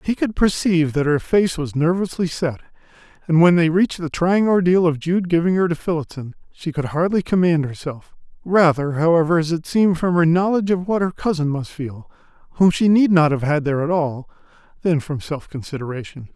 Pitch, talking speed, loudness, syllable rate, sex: 165 Hz, 200 wpm, -19 LUFS, 5.5 syllables/s, male